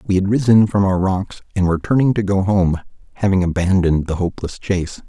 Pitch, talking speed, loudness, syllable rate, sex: 95 Hz, 200 wpm, -17 LUFS, 6.2 syllables/s, male